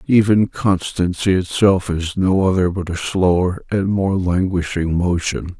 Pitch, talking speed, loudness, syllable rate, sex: 90 Hz, 140 wpm, -18 LUFS, 4.1 syllables/s, male